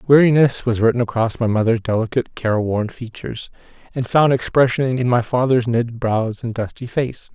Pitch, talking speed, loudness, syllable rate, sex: 120 Hz, 165 wpm, -18 LUFS, 5.5 syllables/s, male